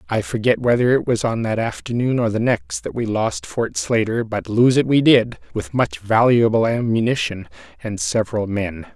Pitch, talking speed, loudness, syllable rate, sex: 115 Hz, 190 wpm, -19 LUFS, 4.8 syllables/s, male